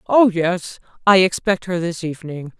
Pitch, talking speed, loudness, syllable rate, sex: 180 Hz, 160 wpm, -18 LUFS, 4.7 syllables/s, female